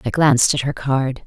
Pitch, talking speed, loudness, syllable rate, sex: 135 Hz, 240 wpm, -17 LUFS, 5.2 syllables/s, female